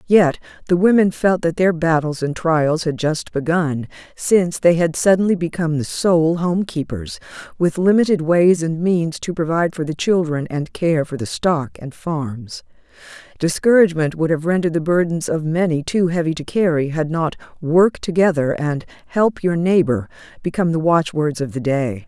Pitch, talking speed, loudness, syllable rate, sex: 165 Hz, 175 wpm, -18 LUFS, 4.8 syllables/s, female